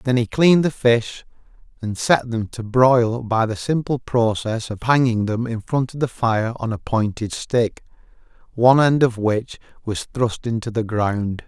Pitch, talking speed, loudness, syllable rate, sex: 115 Hz, 185 wpm, -20 LUFS, 4.3 syllables/s, male